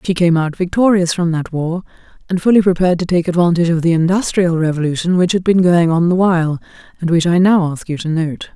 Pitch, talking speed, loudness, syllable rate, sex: 175 Hz, 225 wpm, -15 LUFS, 6.1 syllables/s, female